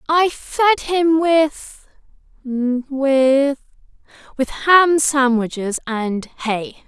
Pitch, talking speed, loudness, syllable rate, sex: 280 Hz, 70 wpm, -17 LUFS, 2.4 syllables/s, female